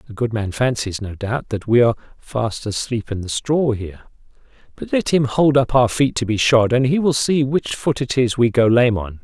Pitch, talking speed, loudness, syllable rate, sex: 120 Hz, 240 wpm, -18 LUFS, 5.1 syllables/s, male